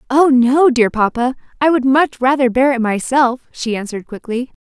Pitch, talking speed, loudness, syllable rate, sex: 255 Hz, 180 wpm, -15 LUFS, 4.9 syllables/s, female